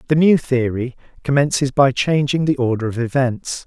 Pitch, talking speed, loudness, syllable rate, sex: 135 Hz, 165 wpm, -18 LUFS, 5.0 syllables/s, male